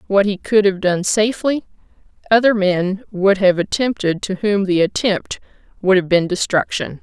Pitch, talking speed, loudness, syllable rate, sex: 195 Hz, 160 wpm, -17 LUFS, 4.7 syllables/s, female